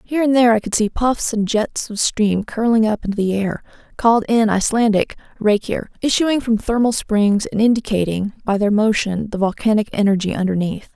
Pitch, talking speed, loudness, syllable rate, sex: 215 Hz, 180 wpm, -18 LUFS, 5.5 syllables/s, female